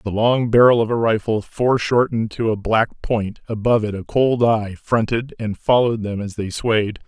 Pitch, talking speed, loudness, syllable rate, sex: 110 Hz, 195 wpm, -19 LUFS, 5.0 syllables/s, male